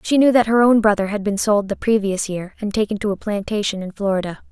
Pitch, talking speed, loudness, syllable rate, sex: 205 Hz, 255 wpm, -19 LUFS, 6.0 syllables/s, female